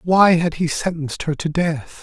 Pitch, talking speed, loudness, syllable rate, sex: 165 Hz, 205 wpm, -19 LUFS, 4.7 syllables/s, male